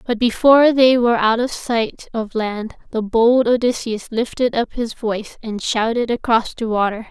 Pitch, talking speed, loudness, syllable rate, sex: 230 Hz, 175 wpm, -18 LUFS, 4.6 syllables/s, female